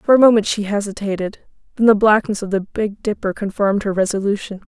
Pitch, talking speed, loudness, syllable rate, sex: 205 Hz, 190 wpm, -18 LUFS, 6.0 syllables/s, female